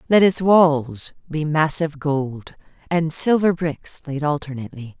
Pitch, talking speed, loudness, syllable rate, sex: 155 Hz, 130 wpm, -20 LUFS, 4.2 syllables/s, female